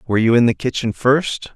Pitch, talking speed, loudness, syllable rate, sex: 115 Hz, 230 wpm, -17 LUFS, 5.8 syllables/s, male